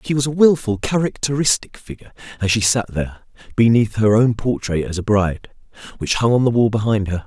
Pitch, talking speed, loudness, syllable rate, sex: 115 Hz, 200 wpm, -18 LUFS, 5.9 syllables/s, male